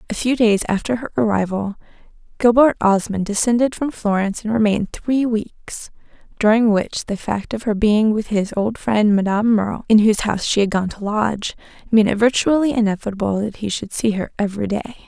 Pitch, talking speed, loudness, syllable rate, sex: 215 Hz, 185 wpm, -18 LUFS, 5.6 syllables/s, female